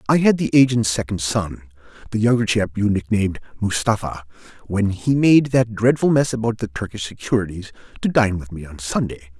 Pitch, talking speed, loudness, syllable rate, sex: 105 Hz, 180 wpm, -20 LUFS, 4.0 syllables/s, male